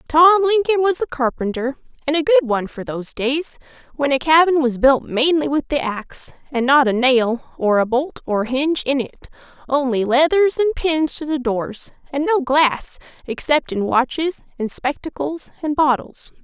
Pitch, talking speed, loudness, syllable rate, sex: 280 Hz, 180 wpm, -18 LUFS, 4.6 syllables/s, female